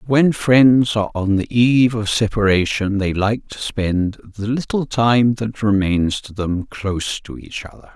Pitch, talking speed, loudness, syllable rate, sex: 110 Hz, 180 wpm, -18 LUFS, 4.2 syllables/s, male